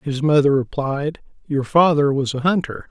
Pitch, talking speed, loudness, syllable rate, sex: 145 Hz, 165 wpm, -19 LUFS, 4.7 syllables/s, male